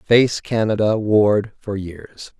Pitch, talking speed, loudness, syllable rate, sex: 105 Hz, 125 wpm, -18 LUFS, 3.1 syllables/s, male